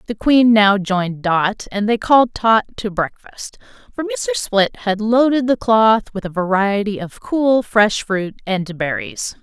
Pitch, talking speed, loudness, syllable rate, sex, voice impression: 215 Hz, 170 wpm, -17 LUFS, 4.0 syllables/s, female, feminine, adult-like, tensed, slightly powerful, clear, fluent, intellectual, elegant, lively, slightly strict, sharp